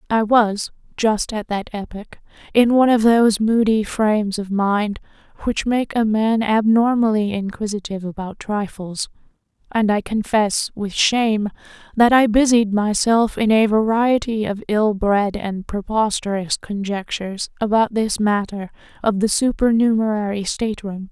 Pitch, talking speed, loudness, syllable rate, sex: 215 Hz, 135 wpm, -19 LUFS, 4.5 syllables/s, female